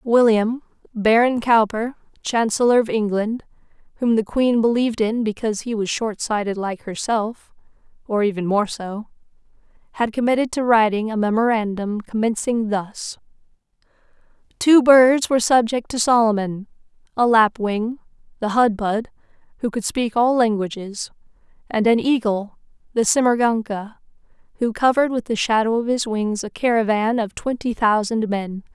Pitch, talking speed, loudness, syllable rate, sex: 225 Hz, 130 wpm, -20 LUFS, 4.8 syllables/s, female